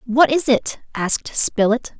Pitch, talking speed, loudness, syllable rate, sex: 245 Hz, 150 wpm, -18 LUFS, 4.0 syllables/s, female